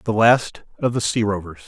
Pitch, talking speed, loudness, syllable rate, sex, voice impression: 110 Hz, 215 wpm, -20 LUFS, 5.1 syllables/s, male, very masculine, very middle-aged, thick, tensed, powerful, slightly dark, slightly hard, slightly clear, fluent, slightly raspy, cool, intellectual, slightly refreshing, sincere, slightly calm, friendly, reassuring, slightly unique, slightly elegant, wild, slightly sweet, slightly lively, slightly strict, slightly modest